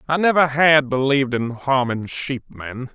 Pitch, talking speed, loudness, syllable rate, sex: 135 Hz, 165 wpm, -18 LUFS, 4.9 syllables/s, male